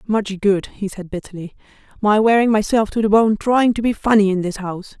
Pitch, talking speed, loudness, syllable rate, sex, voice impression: 205 Hz, 215 wpm, -17 LUFS, 5.6 syllables/s, female, feminine, slightly gender-neutral, young, adult-like, powerful, very soft, clear, fluent, slightly cool, intellectual, sincere, calm, slightly friendly, reassuring, very elegant, sweet, slightly lively, kind, slightly modest